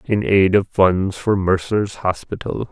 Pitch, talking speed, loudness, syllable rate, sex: 95 Hz, 155 wpm, -18 LUFS, 3.9 syllables/s, male